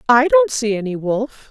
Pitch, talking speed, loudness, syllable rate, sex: 250 Hz, 200 wpm, -17 LUFS, 4.6 syllables/s, female